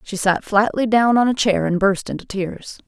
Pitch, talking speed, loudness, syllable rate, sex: 205 Hz, 230 wpm, -18 LUFS, 4.8 syllables/s, female